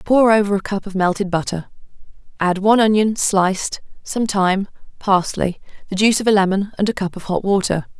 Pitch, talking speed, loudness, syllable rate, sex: 200 Hz, 190 wpm, -18 LUFS, 5.8 syllables/s, female